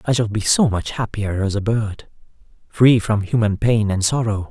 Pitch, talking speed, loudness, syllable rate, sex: 110 Hz, 200 wpm, -19 LUFS, 4.7 syllables/s, male